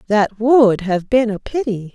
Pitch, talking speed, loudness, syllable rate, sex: 220 Hz, 185 wpm, -16 LUFS, 4.0 syllables/s, female